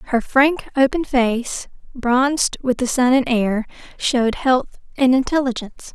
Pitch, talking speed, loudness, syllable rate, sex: 255 Hz, 140 wpm, -18 LUFS, 4.2 syllables/s, female